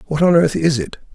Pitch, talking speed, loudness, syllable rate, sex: 155 Hz, 260 wpm, -16 LUFS, 6.0 syllables/s, male